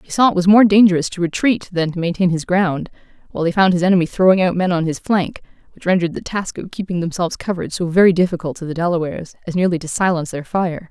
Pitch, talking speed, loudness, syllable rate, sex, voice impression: 175 Hz, 240 wpm, -17 LUFS, 6.9 syllables/s, female, feminine, very adult-like, slightly intellectual, elegant